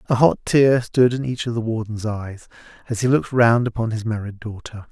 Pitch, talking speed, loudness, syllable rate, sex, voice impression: 115 Hz, 220 wpm, -20 LUFS, 5.4 syllables/s, male, masculine, adult-like, slightly soft, slightly sincere, slightly calm, friendly